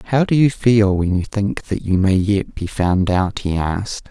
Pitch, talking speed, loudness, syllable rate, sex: 100 Hz, 235 wpm, -18 LUFS, 4.2 syllables/s, male